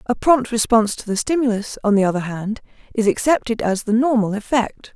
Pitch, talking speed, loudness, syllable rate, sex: 225 Hz, 195 wpm, -19 LUFS, 5.6 syllables/s, female